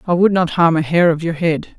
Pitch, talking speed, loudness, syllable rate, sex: 170 Hz, 300 wpm, -15 LUFS, 5.8 syllables/s, female